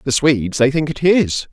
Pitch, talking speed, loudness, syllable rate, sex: 140 Hz, 235 wpm, -16 LUFS, 5.1 syllables/s, male